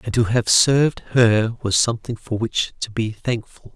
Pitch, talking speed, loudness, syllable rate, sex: 115 Hz, 190 wpm, -19 LUFS, 4.6 syllables/s, male